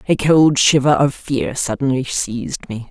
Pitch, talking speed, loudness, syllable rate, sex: 130 Hz, 165 wpm, -16 LUFS, 4.3 syllables/s, female